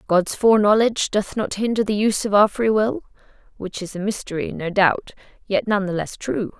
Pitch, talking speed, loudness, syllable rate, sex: 205 Hz, 200 wpm, -20 LUFS, 3.4 syllables/s, female